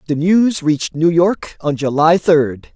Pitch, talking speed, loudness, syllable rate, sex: 160 Hz, 175 wpm, -15 LUFS, 4.0 syllables/s, male